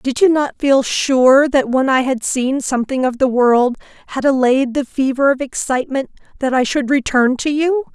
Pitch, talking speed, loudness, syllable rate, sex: 265 Hz, 180 wpm, -16 LUFS, 4.7 syllables/s, female